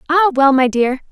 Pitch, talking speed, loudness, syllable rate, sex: 285 Hz, 215 wpm, -14 LUFS, 5.2 syllables/s, female